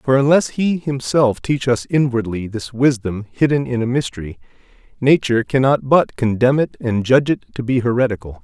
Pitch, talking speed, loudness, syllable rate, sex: 125 Hz, 170 wpm, -17 LUFS, 5.2 syllables/s, male